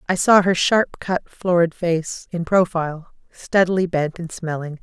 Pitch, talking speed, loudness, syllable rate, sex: 170 Hz, 160 wpm, -20 LUFS, 4.4 syllables/s, female